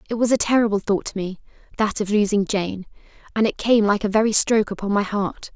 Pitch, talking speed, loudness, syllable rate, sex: 210 Hz, 225 wpm, -20 LUFS, 6.0 syllables/s, female